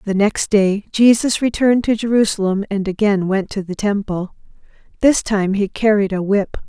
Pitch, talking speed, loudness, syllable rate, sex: 205 Hz, 170 wpm, -17 LUFS, 4.9 syllables/s, female